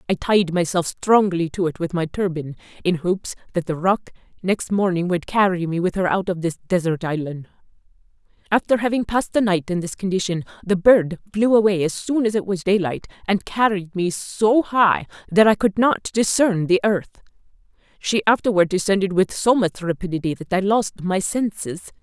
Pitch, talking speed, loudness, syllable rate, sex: 190 Hz, 185 wpm, -20 LUFS, 5.2 syllables/s, female